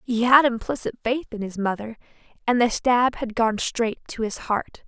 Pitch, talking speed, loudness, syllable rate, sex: 235 Hz, 195 wpm, -23 LUFS, 4.7 syllables/s, female